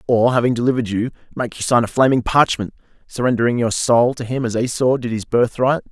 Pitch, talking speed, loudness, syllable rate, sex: 120 Hz, 215 wpm, -18 LUFS, 6.1 syllables/s, male